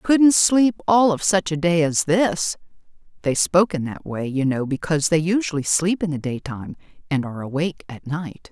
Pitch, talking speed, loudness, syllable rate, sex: 165 Hz, 195 wpm, -20 LUFS, 5.1 syllables/s, female